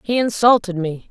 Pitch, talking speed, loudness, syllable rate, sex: 205 Hz, 160 wpm, -17 LUFS, 5.0 syllables/s, female